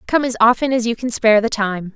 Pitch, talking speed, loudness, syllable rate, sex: 230 Hz, 275 wpm, -16 LUFS, 6.2 syllables/s, female